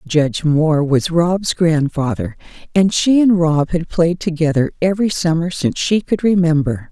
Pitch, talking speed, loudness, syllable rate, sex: 165 Hz, 155 wpm, -16 LUFS, 4.8 syllables/s, female